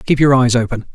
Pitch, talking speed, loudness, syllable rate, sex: 125 Hz, 255 wpm, -14 LUFS, 5.8 syllables/s, male